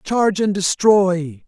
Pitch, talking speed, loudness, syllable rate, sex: 190 Hz, 120 wpm, -17 LUFS, 3.7 syllables/s, male